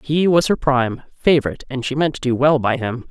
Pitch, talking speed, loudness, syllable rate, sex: 135 Hz, 250 wpm, -18 LUFS, 6.1 syllables/s, female